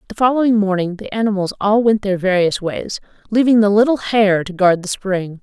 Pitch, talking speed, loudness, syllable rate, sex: 200 Hz, 200 wpm, -16 LUFS, 5.3 syllables/s, female